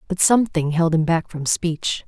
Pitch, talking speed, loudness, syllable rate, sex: 170 Hz, 205 wpm, -20 LUFS, 4.8 syllables/s, female